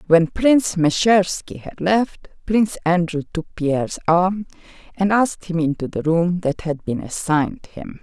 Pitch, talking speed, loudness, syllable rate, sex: 175 Hz, 155 wpm, -20 LUFS, 4.4 syllables/s, female